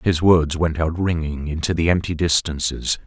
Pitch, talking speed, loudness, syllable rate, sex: 80 Hz, 175 wpm, -20 LUFS, 4.8 syllables/s, male